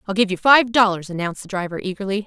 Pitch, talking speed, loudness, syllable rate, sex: 200 Hz, 240 wpm, -19 LUFS, 7.1 syllables/s, female